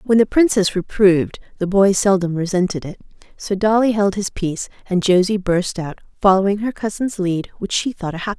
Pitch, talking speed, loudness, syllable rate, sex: 195 Hz, 200 wpm, -18 LUFS, 5.8 syllables/s, female